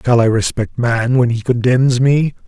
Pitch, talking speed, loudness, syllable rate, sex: 120 Hz, 195 wpm, -15 LUFS, 4.4 syllables/s, male